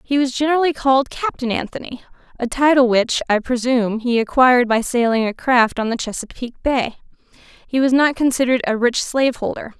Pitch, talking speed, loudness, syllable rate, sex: 250 Hz, 165 wpm, -18 LUFS, 5.9 syllables/s, female